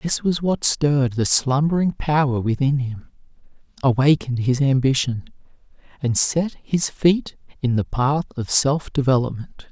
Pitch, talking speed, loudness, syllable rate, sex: 140 Hz, 135 wpm, -20 LUFS, 4.5 syllables/s, male